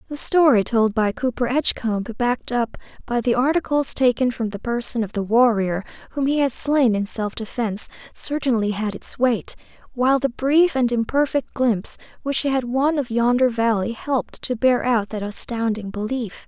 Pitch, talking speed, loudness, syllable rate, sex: 240 Hz, 180 wpm, -21 LUFS, 5.1 syllables/s, female